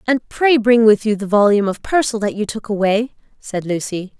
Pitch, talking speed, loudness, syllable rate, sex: 215 Hz, 215 wpm, -17 LUFS, 5.3 syllables/s, female